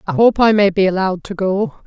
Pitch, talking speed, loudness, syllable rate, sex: 195 Hz, 255 wpm, -15 LUFS, 5.8 syllables/s, female